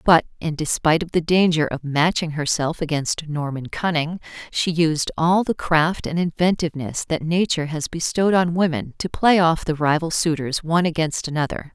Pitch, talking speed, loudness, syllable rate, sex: 160 Hz, 175 wpm, -21 LUFS, 5.1 syllables/s, female